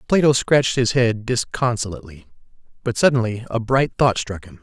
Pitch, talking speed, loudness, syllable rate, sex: 120 Hz, 155 wpm, -19 LUFS, 5.4 syllables/s, male